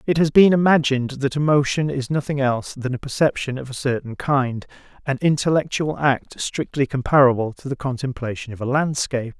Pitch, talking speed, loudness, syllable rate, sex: 135 Hz, 170 wpm, -20 LUFS, 5.6 syllables/s, male